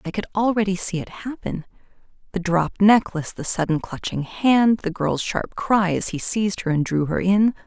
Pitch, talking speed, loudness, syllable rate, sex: 190 Hz, 190 wpm, -21 LUFS, 5.1 syllables/s, female